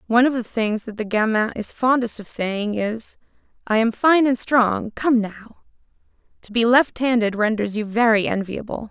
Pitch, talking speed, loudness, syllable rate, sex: 225 Hz, 175 wpm, -20 LUFS, 4.7 syllables/s, female